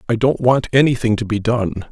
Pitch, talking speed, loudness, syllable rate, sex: 115 Hz, 220 wpm, -17 LUFS, 5.7 syllables/s, male